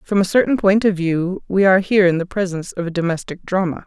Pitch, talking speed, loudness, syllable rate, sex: 185 Hz, 250 wpm, -18 LUFS, 6.4 syllables/s, female